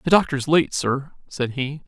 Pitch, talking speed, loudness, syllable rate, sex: 145 Hz, 190 wpm, -22 LUFS, 4.4 syllables/s, male